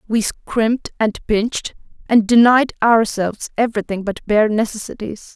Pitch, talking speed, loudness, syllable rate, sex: 220 Hz, 125 wpm, -17 LUFS, 4.8 syllables/s, female